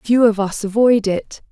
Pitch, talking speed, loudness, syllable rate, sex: 215 Hz, 200 wpm, -16 LUFS, 4.2 syllables/s, female